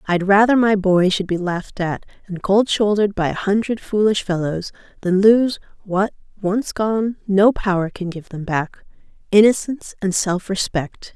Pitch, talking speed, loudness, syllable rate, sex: 200 Hz, 160 wpm, -19 LUFS, 4.6 syllables/s, female